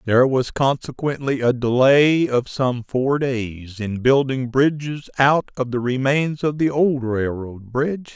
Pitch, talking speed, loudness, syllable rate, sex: 130 Hz, 155 wpm, -20 LUFS, 3.9 syllables/s, male